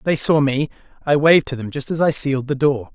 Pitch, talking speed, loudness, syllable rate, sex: 140 Hz, 245 wpm, -18 LUFS, 6.2 syllables/s, male